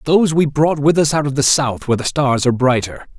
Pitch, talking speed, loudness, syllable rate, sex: 140 Hz, 265 wpm, -15 LUFS, 6.1 syllables/s, male